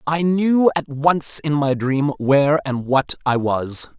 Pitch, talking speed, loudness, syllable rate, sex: 145 Hz, 180 wpm, -18 LUFS, 3.7 syllables/s, male